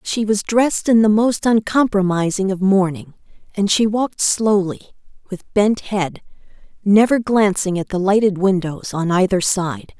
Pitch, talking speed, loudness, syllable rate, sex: 200 Hz, 150 wpm, -17 LUFS, 4.5 syllables/s, female